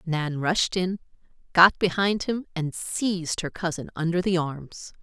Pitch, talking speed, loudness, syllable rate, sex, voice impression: 175 Hz, 155 wpm, -24 LUFS, 4.1 syllables/s, female, feminine, adult-like, clear, intellectual, slightly elegant, slightly strict